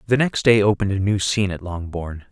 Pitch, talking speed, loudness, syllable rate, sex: 100 Hz, 235 wpm, -20 LUFS, 6.2 syllables/s, male